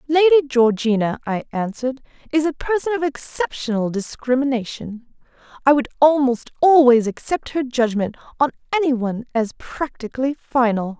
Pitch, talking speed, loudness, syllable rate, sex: 260 Hz, 120 wpm, -19 LUFS, 5.0 syllables/s, female